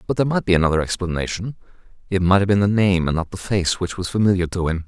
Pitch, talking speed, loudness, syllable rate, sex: 95 Hz, 260 wpm, -20 LUFS, 6.9 syllables/s, male